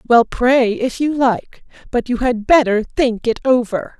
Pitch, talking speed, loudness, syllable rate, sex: 240 Hz, 180 wpm, -16 LUFS, 4.0 syllables/s, female